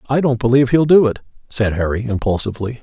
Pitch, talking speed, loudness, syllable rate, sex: 120 Hz, 190 wpm, -16 LUFS, 6.9 syllables/s, male